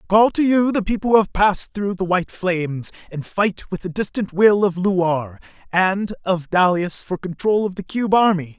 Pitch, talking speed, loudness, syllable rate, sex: 190 Hz, 205 wpm, -19 LUFS, 4.9 syllables/s, male